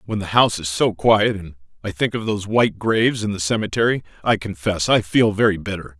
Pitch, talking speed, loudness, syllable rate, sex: 100 Hz, 220 wpm, -19 LUFS, 6.0 syllables/s, male